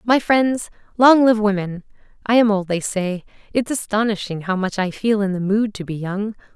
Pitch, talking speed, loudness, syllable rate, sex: 210 Hz, 200 wpm, -19 LUFS, 4.9 syllables/s, female